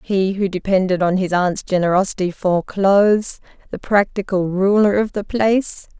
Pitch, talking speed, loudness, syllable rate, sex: 190 Hz, 150 wpm, -17 LUFS, 4.7 syllables/s, female